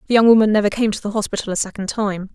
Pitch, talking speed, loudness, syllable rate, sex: 210 Hz, 280 wpm, -18 LUFS, 7.4 syllables/s, female